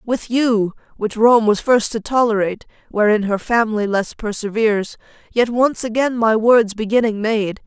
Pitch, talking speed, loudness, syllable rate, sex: 220 Hz, 155 wpm, -17 LUFS, 3.6 syllables/s, female